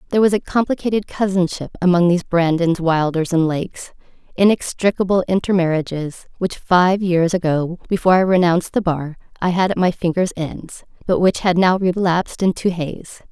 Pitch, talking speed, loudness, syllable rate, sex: 180 Hz, 155 wpm, -18 LUFS, 5.3 syllables/s, female